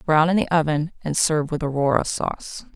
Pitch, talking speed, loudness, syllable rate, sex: 155 Hz, 195 wpm, -21 LUFS, 5.7 syllables/s, female